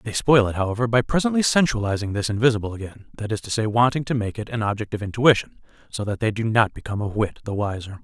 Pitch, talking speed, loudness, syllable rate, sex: 110 Hz, 240 wpm, -22 LUFS, 6.7 syllables/s, male